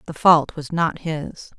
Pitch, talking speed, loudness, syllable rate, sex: 160 Hz, 190 wpm, -20 LUFS, 3.7 syllables/s, female